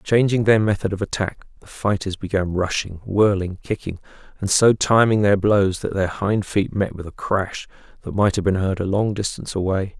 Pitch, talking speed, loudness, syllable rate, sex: 100 Hz, 200 wpm, -20 LUFS, 5.0 syllables/s, male